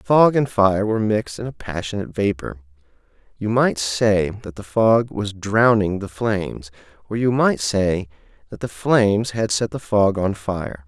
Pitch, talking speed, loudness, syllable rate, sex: 105 Hz, 180 wpm, -20 LUFS, 4.6 syllables/s, male